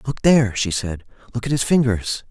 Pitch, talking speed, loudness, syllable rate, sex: 115 Hz, 210 wpm, -19 LUFS, 5.6 syllables/s, male